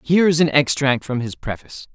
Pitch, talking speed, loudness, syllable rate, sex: 135 Hz, 215 wpm, -18 LUFS, 6.0 syllables/s, male